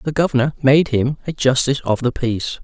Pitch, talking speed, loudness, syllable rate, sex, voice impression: 135 Hz, 205 wpm, -18 LUFS, 6.0 syllables/s, male, masculine, adult-like, slightly thick, tensed, slightly powerful, slightly hard, clear, fluent, cool, intellectual, calm, slightly mature, slightly reassuring, wild, slightly lively, slightly kind